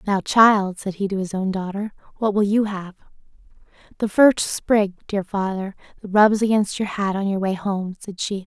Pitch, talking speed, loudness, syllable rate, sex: 200 Hz, 195 wpm, -21 LUFS, 4.6 syllables/s, female